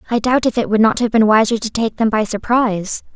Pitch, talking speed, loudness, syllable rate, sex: 225 Hz, 265 wpm, -16 LUFS, 6.0 syllables/s, female